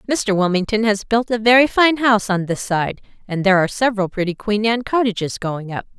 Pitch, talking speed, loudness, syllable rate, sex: 210 Hz, 210 wpm, -18 LUFS, 6.1 syllables/s, female